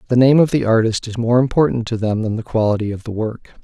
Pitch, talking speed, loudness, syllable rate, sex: 115 Hz, 265 wpm, -17 LUFS, 6.3 syllables/s, male